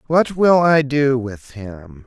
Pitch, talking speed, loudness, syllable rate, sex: 135 Hz, 175 wpm, -16 LUFS, 3.1 syllables/s, male